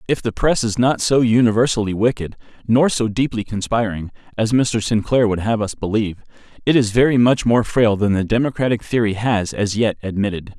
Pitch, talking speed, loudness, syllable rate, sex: 110 Hz, 185 wpm, -18 LUFS, 5.5 syllables/s, male